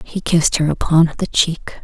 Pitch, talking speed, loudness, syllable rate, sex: 165 Hz, 195 wpm, -16 LUFS, 4.8 syllables/s, female